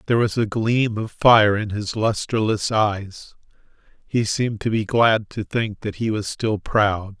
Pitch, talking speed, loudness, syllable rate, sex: 105 Hz, 185 wpm, -21 LUFS, 4.2 syllables/s, male